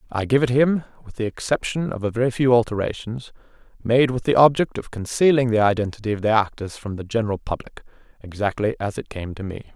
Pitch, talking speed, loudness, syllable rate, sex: 115 Hz, 205 wpm, -21 LUFS, 6.1 syllables/s, male